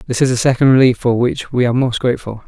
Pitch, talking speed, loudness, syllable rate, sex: 125 Hz, 265 wpm, -15 LUFS, 7.0 syllables/s, male